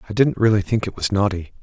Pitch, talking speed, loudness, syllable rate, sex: 105 Hz, 260 wpm, -20 LUFS, 6.7 syllables/s, male